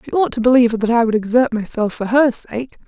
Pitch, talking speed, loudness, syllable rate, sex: 240 Hz, 250 wpm, -16 LUFS, 5.9 syllables/s, female